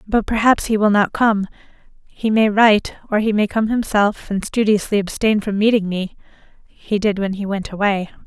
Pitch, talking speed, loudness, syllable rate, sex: 210 Hz, 180 wpm, -18 LUFS, 5.1 syllables/s, female